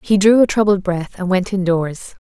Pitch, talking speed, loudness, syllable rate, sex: 190 Hz, 240 wpm, -16 LUFS, 4.9 syllables/s, female